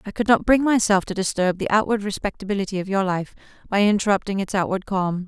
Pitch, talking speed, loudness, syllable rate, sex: 200 Hz, 205 wpm, -21 LUFS, 6.2 syllables/s, female